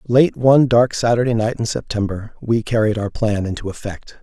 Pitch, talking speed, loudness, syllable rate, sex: 110 Hz, 185 wpm, -18 LUFS, 5.4 syllables/s, male